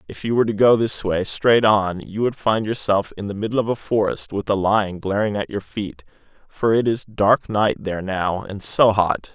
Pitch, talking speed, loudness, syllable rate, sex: 105 Hz, 230 wpm, -20 LUFS, 4.9 syllables/s, male